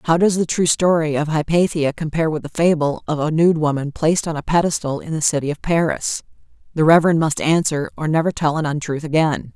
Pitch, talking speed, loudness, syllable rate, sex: 155 Hz, 215 wpm, -18 LUFS, 5.9 syllables/s, female